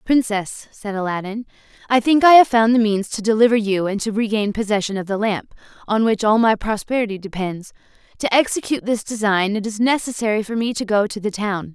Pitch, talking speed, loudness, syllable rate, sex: 215 Hz, 205 wpm, -19 LUFS, 5.7 syllables/s, female